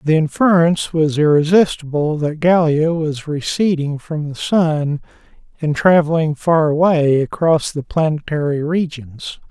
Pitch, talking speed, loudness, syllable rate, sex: 155 Hz, 120 wpm, -16 LUFS, 4.3 syllables/s, male